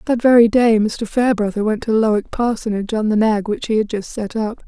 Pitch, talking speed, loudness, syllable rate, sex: 220 Hz, 230 wpm, -17 LUFS, 5.8 syllables/s, female